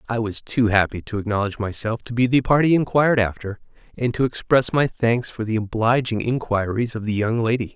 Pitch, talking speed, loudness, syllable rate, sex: 115 Hz, 200 wpm, -21 LUFS, 5.7 syllables/s, male